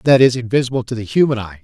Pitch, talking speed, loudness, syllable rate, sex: 120 Hz, 255 wpm, -16 LUFS, 6.9 syllables/s, male